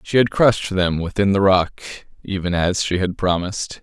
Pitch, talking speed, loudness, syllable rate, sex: 95 Hz, 170 wpm, -19 LUFS, 5.2 syllables/s, male